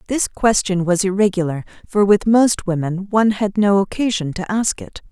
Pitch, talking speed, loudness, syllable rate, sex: 200 Hz, 175 wpm, -17 LUFS, 5.0 syllables/s, female